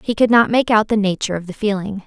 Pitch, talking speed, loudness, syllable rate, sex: 210 Hz, 290 wpm, -17 LUFS, 6.6 syllables/s, female